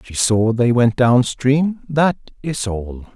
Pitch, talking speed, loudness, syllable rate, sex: 125 Hz, 150 wpm, -17 LUFS, 3.3 syllables/s, male